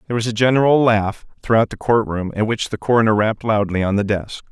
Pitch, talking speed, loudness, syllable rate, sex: 110 Hz, 225 wpm, -18 LUFS, 6.3 syllables/s, male